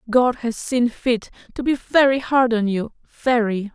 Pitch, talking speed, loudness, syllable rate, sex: 240 Hz, 175 wpm, -20 LUFS, 4.1 syllables/s, female